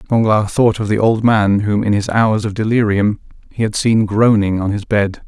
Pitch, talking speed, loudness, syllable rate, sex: 105 Hz, 215 wpm, -15 LUFS, 4.7 syllables/s, male